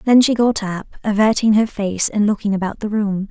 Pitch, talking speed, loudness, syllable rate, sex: 210 Hz, 220 wpm, -17 LUFS, 5.3 syllables/s, female